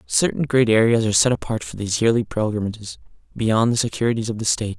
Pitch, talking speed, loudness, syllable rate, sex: 115 Hz, 200 wpm, -20 LUFS, 6.8 syllables/s, male